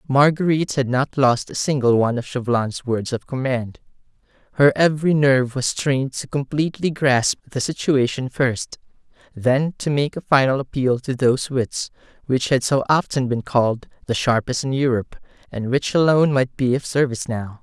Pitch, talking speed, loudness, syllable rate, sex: 130 Hz, 170 wpm, -20 LUFS, 5.2 syllables/s, male